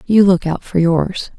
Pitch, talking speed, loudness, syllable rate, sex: 180 Hz, 215 wpm, -15 LUFS, 4.0 syllables/s, female